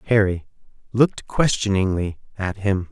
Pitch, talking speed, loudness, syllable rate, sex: 100 Hz, 105 wpm, -22 LUFS, 4.8 syllables/s, male